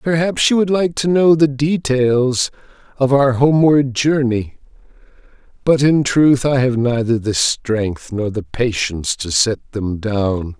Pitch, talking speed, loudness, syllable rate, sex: 130 Hz, 155 wpm, -16 LUFS, 3.9 syllables/s, male